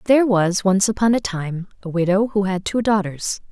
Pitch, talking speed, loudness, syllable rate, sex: 200 Hz, 205 wpm, -19 LUFS, 5.1 syllables/s, female